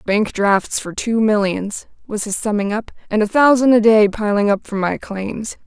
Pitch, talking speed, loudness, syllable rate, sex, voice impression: 210 Hz, 200 wpm, -17 LUFS, 4.5 syllables/s, female, very feminine, young, slightly adult-like, very thin, very tensed, powerful, slightly bright, slightly soft, clear, fluent, slightly raspy, very cute, intellectual, very refreshing, sincere, slightly calm, friendly, reassuring, very unique, elegant, slightly wild, sweet, lively, kind, intense, slightly modest, slightly light